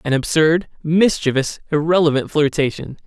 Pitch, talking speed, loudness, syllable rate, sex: 155 Hz, 100 wpm, -17 LUFS, 4.9 syllables/s, male